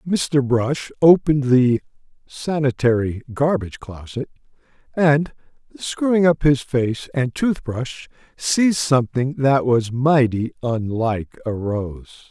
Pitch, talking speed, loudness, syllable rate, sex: 130 Hz, 110 wpm, -19 LUFS, 3.9 syllables/s, male